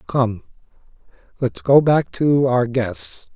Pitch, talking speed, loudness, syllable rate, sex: 130 Hz, 145 wpm, -18 LUFS, 3.2 syllables/s, male